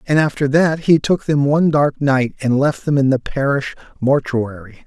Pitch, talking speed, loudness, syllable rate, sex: 140 Hz, 195 wpm, -17 LUFS, 4.8 syllables/s, male